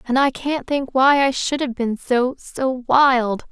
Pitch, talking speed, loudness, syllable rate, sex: 260 Hz, 190 wpm, -19 LUFS, 3.7 syllables/s, female